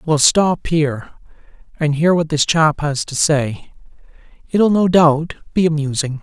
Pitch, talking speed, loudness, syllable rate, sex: 155 Hz, 155 wpm, -16 LUFS, 4.2 syllables/s, male